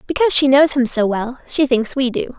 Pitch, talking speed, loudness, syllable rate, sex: 265 Hz, 250 wpm, -16 LUFS, 5.5 syllables/s, female